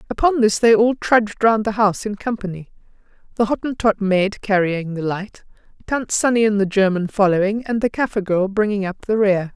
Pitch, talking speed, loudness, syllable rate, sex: 210 Hz, 180 wpm, -18 LUFS, 5.4 syllables/s, female